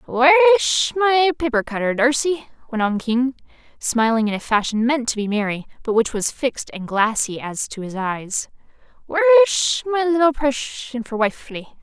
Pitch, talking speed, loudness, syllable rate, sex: 255 Hz, 160 wpm, -19 LUFS, 5.1 syllables/s, female